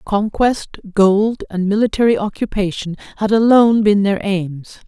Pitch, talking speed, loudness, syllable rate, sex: 205 Hz, 125 wpm, -16 LUFS, 4.6 syllables/s, female